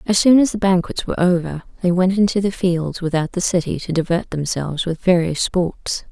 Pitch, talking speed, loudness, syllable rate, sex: 180 Hz, 205 wpm, -18 LUFS, 5.4 syllables/s, female